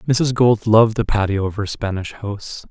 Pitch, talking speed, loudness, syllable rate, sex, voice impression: 110 Hz, 200 wpm, -18 LUFS, 5.1 syllables/s, male, masculine, adult-like, tensed, weak, slightly dark, soft, slightly raspy, cool, intellectual, calm, slightly friendly, reassuring, slightly wild, kind, modest